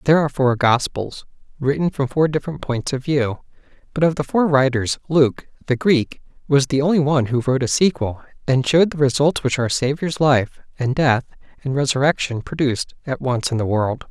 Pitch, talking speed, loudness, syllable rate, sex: 135 Hz, 185 wpm, -19 LUFS, 5.4 syllables/s, male